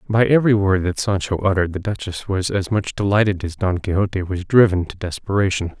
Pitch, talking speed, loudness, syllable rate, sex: 95 Hz, 195 wpm, -19 LUFS, 5.9 syllables/s, male